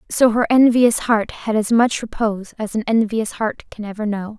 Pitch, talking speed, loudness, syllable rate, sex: 220 Hz, 205 wpm, -18 LUFS, 4.9 syllables/s, female